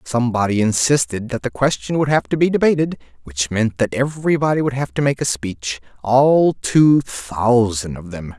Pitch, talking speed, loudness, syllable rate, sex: 125 Hz, 180 wpm, -18 LUFS, 4.9 syllables/s, male